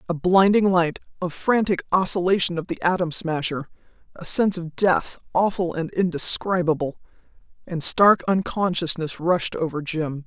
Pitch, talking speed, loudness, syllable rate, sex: 175 Hz, 130 wpm, -22 LUFS, 4.7 syllables/s, female